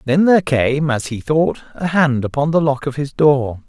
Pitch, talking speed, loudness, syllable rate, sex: 145 Hz, 230 wpm, -17 LUFS, 4.8 syllables/s, male